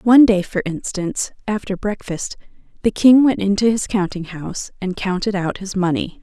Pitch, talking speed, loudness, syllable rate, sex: 200 Hz, 175 wpm, -19 LUFS, 5.1 syllables/s, female